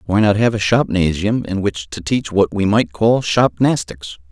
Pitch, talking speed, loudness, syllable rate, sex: 100 Hz, 195 wpm, -17 LUFS, 4.5 syllables/s, male